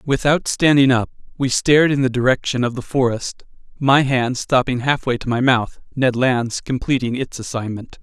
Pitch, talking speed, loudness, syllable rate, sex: 130 Hz, 170 wpm, -18 LUFS, 4.9 syllables/s, male